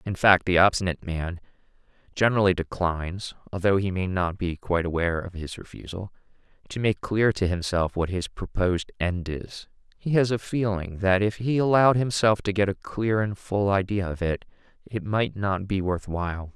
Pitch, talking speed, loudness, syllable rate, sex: 95 Hz, 185 wpm, -25 LUFS, 4.3 syllables/s, male